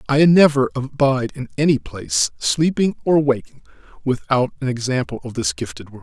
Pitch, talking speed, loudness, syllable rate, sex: 130 Hz, 160 wpm, -19 LUFS, 5.3 syllables/s, male